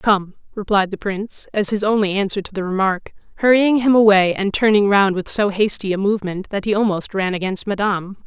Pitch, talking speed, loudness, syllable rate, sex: 200 Hz, 205 wpm, -18 LUFS, 5.6 syllables/s, female